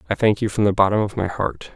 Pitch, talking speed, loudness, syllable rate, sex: 105 Hz, 305 wpm, -20 LUFS, 6.5 syllables/s, male